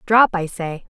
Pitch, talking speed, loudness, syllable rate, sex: 190 Hz, 185 wpm, -19 LUFS, 4.2 syllables/s, female